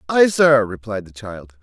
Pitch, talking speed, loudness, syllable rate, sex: 120 Hz, 185 wpm, -17 LUFS, 4.2 syllables/s, male